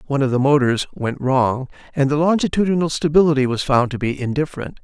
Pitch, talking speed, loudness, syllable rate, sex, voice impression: 140 Hz, 185 wpm, -18 LUFS, 6.2 syllables/s, male, masculine, very adult-like, very middle-aged, slightly thick, slightly tensed, slightly weak, very bright, slightly soft, clear, very fluent, slightly raspy, slightly cool, intellectual, slightly refreshing, sincere, calm, slightly mature, friendly, reassuring, very unique, slightly wild, very lively, kind, slightly intense, slightly sharp